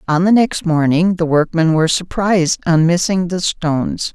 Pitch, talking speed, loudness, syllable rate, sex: 170 Hz, 175 wpm, -15 LUFS, 4.9 syllables/s, female